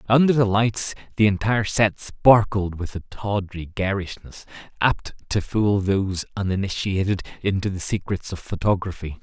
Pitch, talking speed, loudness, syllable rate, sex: 100 Hz, 135 wpm, -22 LUFS, 4.8 syllables/s, male